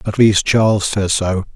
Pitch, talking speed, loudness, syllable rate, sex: 100 Hz, 195 wpm, -15 LUFS, 4.4 syllables/s, male